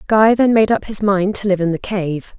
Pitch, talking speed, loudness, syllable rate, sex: 200 Hz, 275 wpm, -16 LUFS, 5.0 syllables/s, female